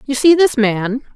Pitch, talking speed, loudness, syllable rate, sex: 255 Hz, 210 wpm, -14 LUFS, 4.5 syllables/s, female